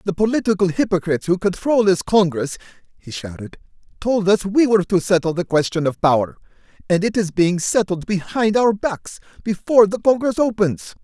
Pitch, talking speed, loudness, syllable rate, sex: 190 Hz, 165 wpm, -18 LUFS, 5.4 syllables/s, male